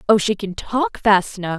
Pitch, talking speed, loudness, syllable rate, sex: 200 Hz, 225 wpm, -19 LUFS, 4.9 syllables/s, female